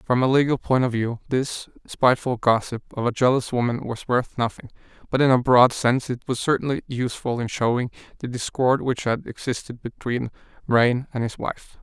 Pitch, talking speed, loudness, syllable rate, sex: 125 Hz, 190 wpm, -22 LUFS, 5.2 syllables/s, male